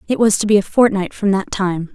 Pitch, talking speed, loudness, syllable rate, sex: 200 Hz, 280 wpm, -16 LUFS, 5.6 syllables/s, female